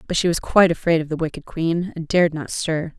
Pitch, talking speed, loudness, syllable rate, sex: 165 Hz, 260 wpm, -20 LUFS, 6.1 syllables/s, female